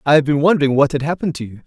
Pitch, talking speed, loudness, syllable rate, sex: 145 Hz, 325 wpm, -16 LUFS, 8.6 syllables/s, male